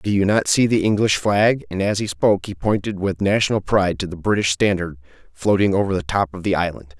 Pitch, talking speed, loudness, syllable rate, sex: 95 Hz, 230 wpm, -19 LUFS, 5.8 syllables/s, male